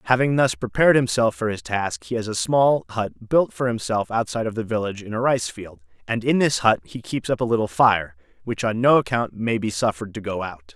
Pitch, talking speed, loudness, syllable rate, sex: 110 Hz, 240 wpm, -22 LUFS, 5.7 syllables/s, male